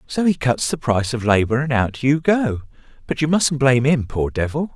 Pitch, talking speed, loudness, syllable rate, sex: 135 Hz, 225 wpm, -19 LUFS, 5.3 syllables/s, male